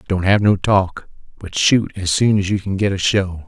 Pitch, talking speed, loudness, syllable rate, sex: 95 Hz, 240 wpm, -17 LUFS, 4.7 syllables/s, male